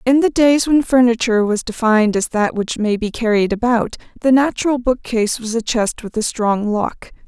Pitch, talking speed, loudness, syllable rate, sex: 230 Hz, 200 wpm, -17 LUFS, 5.2 syllables/s, female